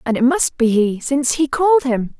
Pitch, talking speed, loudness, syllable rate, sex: 265 Hz, 245 wpm, -16 LUFS, 5.3 syllables/s, female